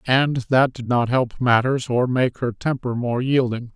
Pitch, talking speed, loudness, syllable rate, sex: 125 Hz, 190 wpm, -20 LUFS, 4.1 syllables/s, male